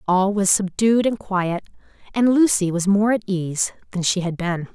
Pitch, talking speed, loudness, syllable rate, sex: 195 Hz, 190 wpm, -20 LUFS, 4.5 syllables/s, female